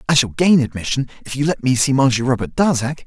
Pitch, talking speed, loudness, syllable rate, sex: 135 Hz, 235 wpm, -17 LUFS, 6.2 syllables/s, male